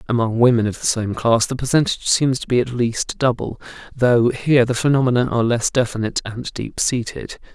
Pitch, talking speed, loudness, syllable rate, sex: 120 Hz, 190 wpm, -19 LUFS, 5.7 syllables/s, male